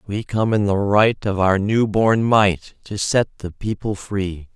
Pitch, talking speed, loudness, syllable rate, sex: 100 Hz, 195 wpm, -19 LUFS, 3.7 syllables/s, male